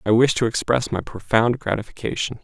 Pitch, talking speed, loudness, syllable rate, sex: 115 Hz, 170 wpm, -21 LUFS, 5.6 syllables/s, male